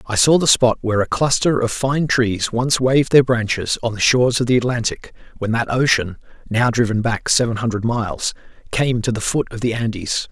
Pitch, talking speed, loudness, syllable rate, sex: 120 Hz, 210 wpm, -18 LUFS, 4.6 syllables/s, male